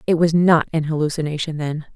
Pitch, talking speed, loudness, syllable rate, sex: 155 Hz, 185 wpm, -19 LUFS, 5.9 syllables/s, female